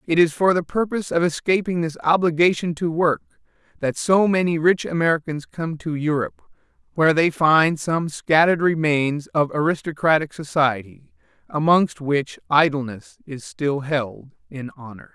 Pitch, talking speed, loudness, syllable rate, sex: 155 Hz, 145 wpm, -20 LUFS, 4.8 syllables/s, male